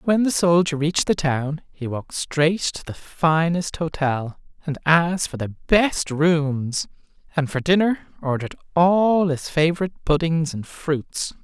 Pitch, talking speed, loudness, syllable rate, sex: 160 Hz, 150 wpm, -21 LUFS, 4.2 syllables/s, male